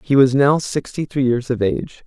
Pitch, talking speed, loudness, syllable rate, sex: 135 Hz, 230 wpm, -18 LUFS, 5.1 syllables/s, male